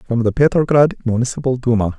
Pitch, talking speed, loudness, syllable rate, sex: 125 Hz, 150 wpm, -16 LUFS, 6.4 syllables/s, male